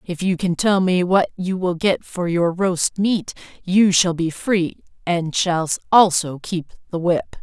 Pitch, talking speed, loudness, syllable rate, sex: 175 Hz, 185 wpm, -19 LUFS, 3.8 syllables/s, female